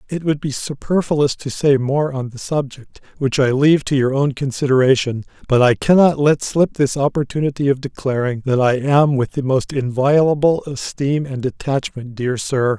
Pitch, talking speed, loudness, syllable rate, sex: 135 Hz, 180 wpm, -17 LUFS, 4.9 syllables/s, male